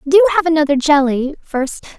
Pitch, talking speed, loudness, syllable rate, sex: 305 Hz, 150 wpm, -15 LUFS, 5.0 syllables/s, female